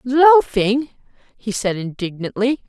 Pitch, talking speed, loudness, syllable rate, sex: 230 Hz, 90 wpm, -18 LUFS, 3.8 syllables/s, female